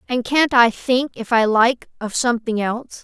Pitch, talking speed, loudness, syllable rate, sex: 240 Hz, 200 wpm, -18 LUFS, 4.8 syllables/s, female